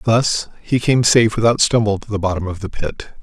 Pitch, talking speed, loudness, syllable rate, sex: 110 Hz, 225 wpm, -17 LUFS, 5.4 syllables/s, male